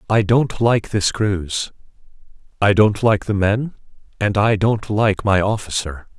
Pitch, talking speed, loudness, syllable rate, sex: 105 Hz, 155 wpm, -18 LUFS, 4.1 syllables/s, male